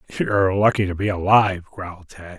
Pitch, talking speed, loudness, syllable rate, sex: 95 Hz, 175 wpm, -19 LUFS, 6.3 syllables/s, male